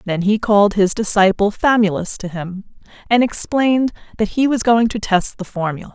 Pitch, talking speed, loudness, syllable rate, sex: 210 Hz, 180 wpm, -17 LUFS, 5.3 syllables/s, female